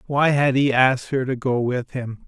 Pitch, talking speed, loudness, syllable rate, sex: 130 Hz, 235 wpm, -20 LUFS, 4.9 syllables/s, male